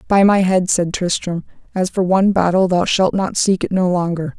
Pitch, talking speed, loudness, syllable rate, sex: 185 Hz, 220 wpm, -16 LUFS, 5.1 syllables/s, female